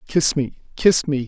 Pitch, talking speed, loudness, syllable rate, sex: 145 Hz, 190 wpm, -19 LUFS, 4.4 syllables/s, male